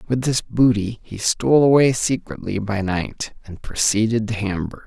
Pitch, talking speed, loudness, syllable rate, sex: 110 Hz, 160 wpm, -20 LUFS, 4.6 syllables/s, male